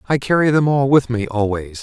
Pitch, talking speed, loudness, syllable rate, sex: 125 Hz, 230 wpm, -17 LUFS, 5.5 syllables/s, male